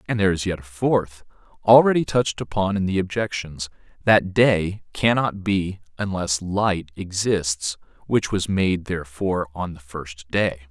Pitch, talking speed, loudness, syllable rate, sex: 95 Hz, 150 wpm, -22 LUFS, 4.4 syllables/s, male